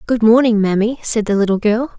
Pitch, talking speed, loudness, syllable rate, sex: 220 Hz, 210 wpm, -15 LUFS, 5.6 syllables/s, female